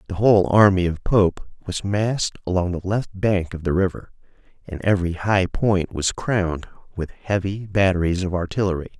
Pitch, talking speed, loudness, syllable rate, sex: 95 Hz, 165 wpm, -21 LUFS, 5.2 syllables/s, male